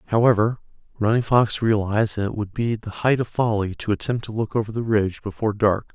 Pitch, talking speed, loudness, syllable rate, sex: 110 Hz, 210 wpm, -22 LUFS, 6.1 syllables/s, male